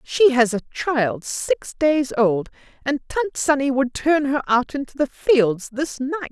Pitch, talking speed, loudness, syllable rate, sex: 270 Hz, 180 wpm, -21 LUFS, 3.8 syllables/s, female